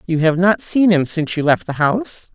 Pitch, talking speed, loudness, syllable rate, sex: 175 Hz, 255 wpm, -16 LUFS, 5.5 syllables/s, female